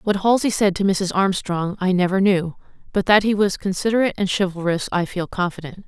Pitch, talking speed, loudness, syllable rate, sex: 190 Hz, 195 wpm, -20 LUFS, 5.7 syllables/s, female